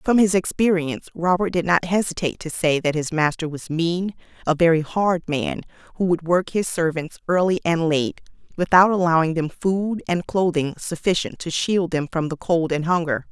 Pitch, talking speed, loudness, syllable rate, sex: 170 Hz, 185 wpm, -21 LUFS, 5.0 syllables/s, female